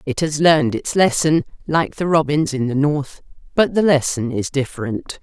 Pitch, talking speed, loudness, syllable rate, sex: 145 Hz, 185 wpm, -18 LUFS, 4.6 syllables/s, female